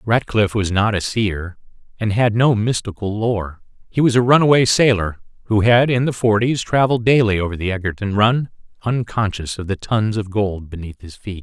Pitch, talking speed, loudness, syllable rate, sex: 110 Hz, 185 wpm, -18 LUFS, 5.1 syllables/s, male